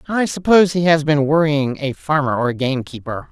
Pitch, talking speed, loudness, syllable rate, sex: 150 Hz, 200 wpm, -17 LUFS, 5.7 syllables/s, female